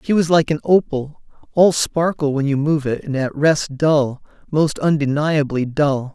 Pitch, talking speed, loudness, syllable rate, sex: 150 Hz, 165 wpm, -18 LUFS, 4.3 syllables/s, male